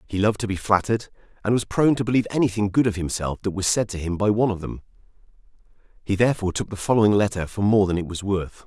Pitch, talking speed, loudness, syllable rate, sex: 100 Hz, 240 wpm, -22 LUFS, 7.4 syllables/s, male